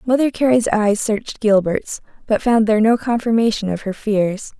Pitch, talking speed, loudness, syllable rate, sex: 220 Hz, 170 wpm, -17 LUFS, 5.1 syllables/s, female